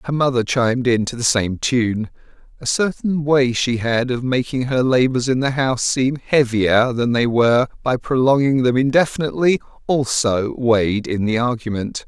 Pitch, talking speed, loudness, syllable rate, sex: 125 Hz, 170 wpm, -18 LUFS, 4.8 syllables/s, male